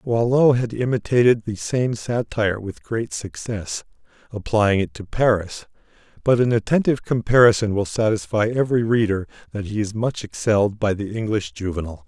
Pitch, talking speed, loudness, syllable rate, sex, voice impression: 110 Hz, 150 wpm, -21 LUFS, 5.2 syllables/s, male, masculine, adult-like, cool, sincere, slightly calm, slightly kind